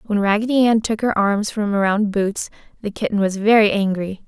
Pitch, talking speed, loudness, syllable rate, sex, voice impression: 205 Hz, 195 wpm, -18 LUFS, 5.2 syllables/s, female, feminine, slightly young, tensed, powerful, soft, clear, calm, friendly, lively